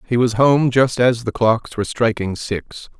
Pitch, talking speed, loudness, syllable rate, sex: 120 Hz, 200 wpm, -18 LUFS, 4.4 syllables/s, male